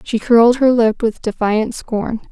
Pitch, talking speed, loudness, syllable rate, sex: 230 Hz, 180 wpm, -15 LUFS, 4.2 syllables/s, female